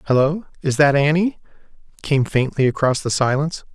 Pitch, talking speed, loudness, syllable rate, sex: 145 Hz, 145 wpm, -19 LUFS, 5.5 syllables/s, male